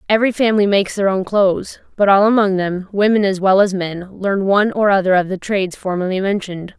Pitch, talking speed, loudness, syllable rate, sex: 195 Hz, 210 wpm, -16 LUFS, 6.1 syllables/s, female